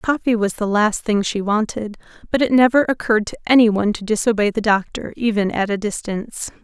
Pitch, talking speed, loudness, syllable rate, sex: 215 Hz, 200 wpm, -18 LUFS, 5.8 syllables/s, female